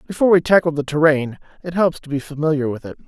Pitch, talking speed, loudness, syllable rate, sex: 155 Hz, 235 wpm, -18 LUFS, 7.0 syllables/s, male